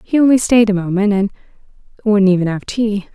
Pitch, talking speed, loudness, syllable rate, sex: 205 Hz, 190 wpm, -15 LUFS, 5.7 syllables/s, female